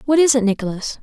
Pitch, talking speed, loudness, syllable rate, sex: 245 Hz, 235 wpm, -17 LUFS, 6.9 syllables/s, female